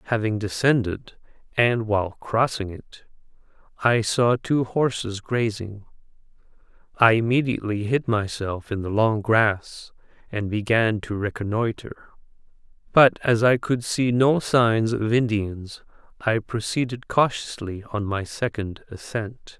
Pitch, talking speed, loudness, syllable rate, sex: 110 Hz, 120 wpm, -23 LUFS, 4.0 syllables/s, male